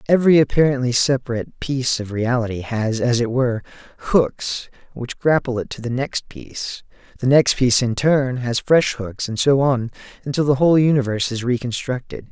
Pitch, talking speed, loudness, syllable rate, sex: 125 Hz, 170 wpm, -19 LUFS, 5.4 syllables/s, male